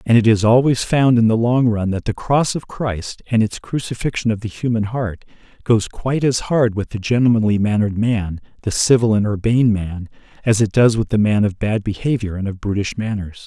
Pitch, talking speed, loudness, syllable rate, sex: 110 Hz, 215 wpm, -18 LUFS, 5.4 syllables/s, male